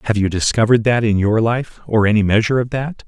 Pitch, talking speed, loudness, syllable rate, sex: 110 Hz, 235 wpm, -16 LUFS, 6.4 syllables/s, male